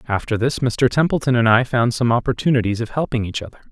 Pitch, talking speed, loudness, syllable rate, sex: 120 Hz, 210 wpm, -19 LUFS, 6.4 syllables/s, male